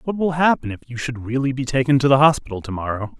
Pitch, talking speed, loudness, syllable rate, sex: 130 Hz, 265 wpm, -20 LUFS, 6.6 syllables/s, male